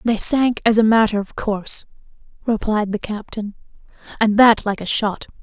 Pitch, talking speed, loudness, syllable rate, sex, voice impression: 215 Hz, 165 wpm, -18 LUFS, 4.9 syllables/s, female, feminine, slightly adult-like, slightly soft, slightly cute, calm, sweet